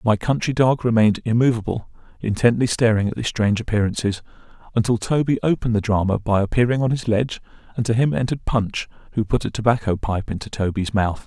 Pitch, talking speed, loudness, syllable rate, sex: 110 Hz, 180 wpm, -21 LUFS, 6.4 syllables/s, male